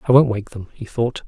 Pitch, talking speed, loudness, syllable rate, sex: 120 Hz, 285 wpm, -20 LUFS, 5.4 syllables/s, male